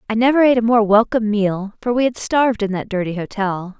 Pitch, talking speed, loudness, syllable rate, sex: 220 Hz, 235 wpm, -17 LUFS, 6.3 syllables/s, female